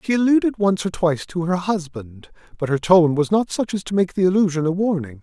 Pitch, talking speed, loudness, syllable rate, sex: 180 Hz, 240 wpm, -19 LUFS, 5.8 syllables/s, male